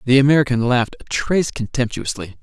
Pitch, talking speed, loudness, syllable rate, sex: 125 Hz, 150 wpm, -18 LUFS, 6.3 syllables/s, male